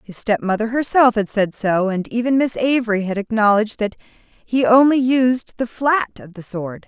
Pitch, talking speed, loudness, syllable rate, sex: 225 Hz, 185 wpm, -18 LUFS, 4.7 syllables/s, female